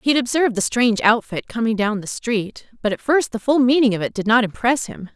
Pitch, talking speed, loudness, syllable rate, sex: 230 Hz, 255 wpm, -19 LUFS, 5.9 syllables/s, female